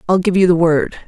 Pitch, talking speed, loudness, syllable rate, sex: 175 Hz, 280 wpm, -14 LUFS, 6.1 syllables/s, female